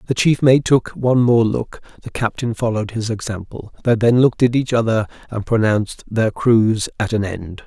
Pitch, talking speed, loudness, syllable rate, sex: 115 Hz, 190 wpm, -18 LUFS, 5.3 syllables/s, male